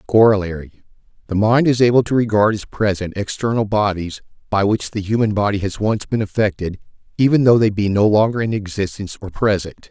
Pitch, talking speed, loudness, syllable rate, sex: 105 Hz, 175 wpm, -18 LUFS, 5.9 syllables/s, male